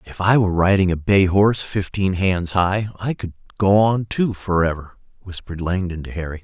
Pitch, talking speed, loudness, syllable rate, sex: 95 Hz, 185 wpm, -19 LUFS, 5.2 syllables/s, male